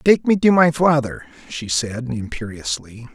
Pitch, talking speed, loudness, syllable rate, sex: 130 Hz, 155 wpm, -19 LUFS, 4.4 syllables/s, male